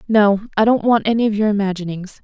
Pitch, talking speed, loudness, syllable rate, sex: 210 Hz, 215 wpm, -17 LUFS, 6.3 syllables/s, female